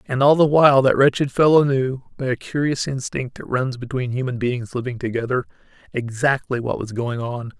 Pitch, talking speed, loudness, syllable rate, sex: 130 Hz, 175 wpm, -20 LUFS, 5.3 syllables/s, male